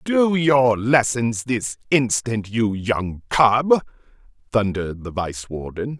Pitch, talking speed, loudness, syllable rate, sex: 115 Hz, 120 wpm, -20 LUFS, 3.4 syllables/s, male